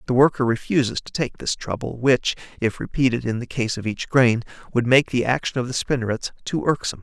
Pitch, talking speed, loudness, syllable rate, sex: 125 Hz, 215 wpm, -22 LUFS, 6.0 syllables/s, male